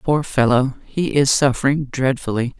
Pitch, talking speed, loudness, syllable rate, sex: 135 Hz, 140 wpm, -18 LUFS, 4.6 syllables/s, female